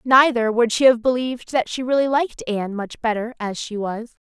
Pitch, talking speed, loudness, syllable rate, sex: 240 Hz, 210 wpm, -20 LUFS, 5.5 syllables/s, female